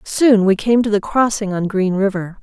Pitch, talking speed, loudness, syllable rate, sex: 205 Hz, 225 wpm, -16 LUFS, 4.7 syllables/s, female